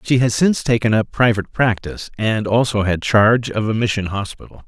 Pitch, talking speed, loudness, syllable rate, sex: 110 Hz, 190 wpm, -17 LUFS, 5.8 syllables/s, male